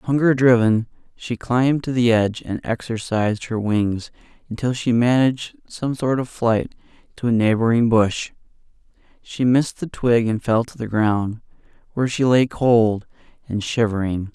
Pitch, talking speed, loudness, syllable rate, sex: 115 Hz, 155 wpm, -20 LUFS, 4.7 syllables/s, male